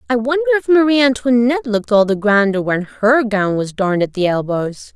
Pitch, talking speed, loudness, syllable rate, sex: 230 Hz, 205 wpm, -15 LUFS, 5.6 syllables/s, female